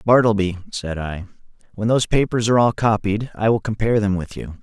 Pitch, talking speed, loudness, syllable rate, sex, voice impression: 105 Hz, 195 wpm, -20 LUFS, 6.0 syllables/s, male, very masculine, very adult-like, middle-aged, very thick, very tensed, very powerful, slightly dark, hard, muffled, fluent, slightly raspy, cool, very intellectual, refreshing, sincere, very calm, very mature, very friendly, very reassuring, very unique, elegant, very wild, sweet, slightly lively, kind, slightly modest